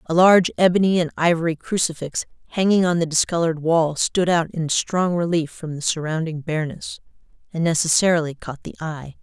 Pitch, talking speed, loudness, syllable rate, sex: 165 Hz, 165 wpm, -20 LUFS, 5.6 syllables/s, female